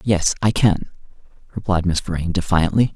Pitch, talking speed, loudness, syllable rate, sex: 90 Hz, 140 wpm, -19 LUFS, 4.9 syllables/s, male